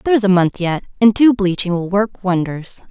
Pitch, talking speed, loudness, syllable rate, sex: 195 Hz, 225 wpm, -16 LUFS, 5.5 syllables/s, female